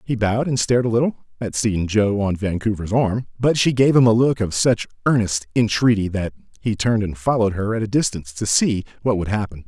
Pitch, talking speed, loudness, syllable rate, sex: 110 Hz, 225 wpm, -20 LUFS, 5.8 syllables/s, male